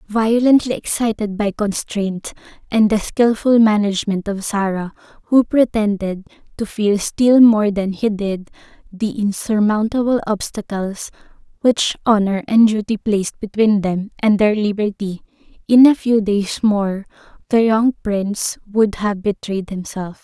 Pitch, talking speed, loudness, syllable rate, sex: 210 Hz, 130 wpm, -17 LUFS, 4.2 syllables/s, female